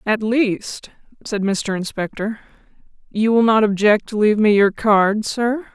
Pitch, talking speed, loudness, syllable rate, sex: 215 Hz, 155 wpm, -18 LUFS, 4.2 syllables/s, female